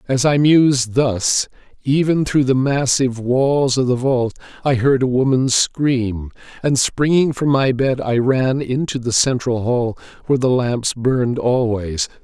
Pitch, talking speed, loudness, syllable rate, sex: 130 Hz, 160 wpm, -17 LUFS, 4.1 syllables/s, male